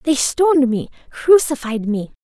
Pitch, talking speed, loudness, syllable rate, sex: 270 Hz, 135 wpm, -17 LUFS, 4.4 syllables/s, female